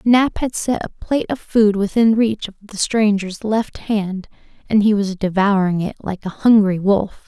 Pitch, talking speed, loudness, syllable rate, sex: 205 Hz, 190 wpm, -18 LUFS, 4.4 syllables/s, female